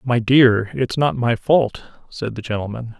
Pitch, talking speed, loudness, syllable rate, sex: 120 Hz, 180 wpm, -18 LUFS, 4.3 syllables/s, male